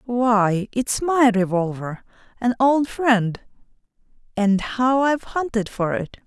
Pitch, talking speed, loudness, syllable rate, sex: 230 Hz, 125 wpm, -20 LUFS, 3.6 syllables/s, female